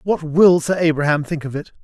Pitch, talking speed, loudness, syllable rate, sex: 160 Hz, 230 wpm, -17 LUFS, 5.5 syllables/s, male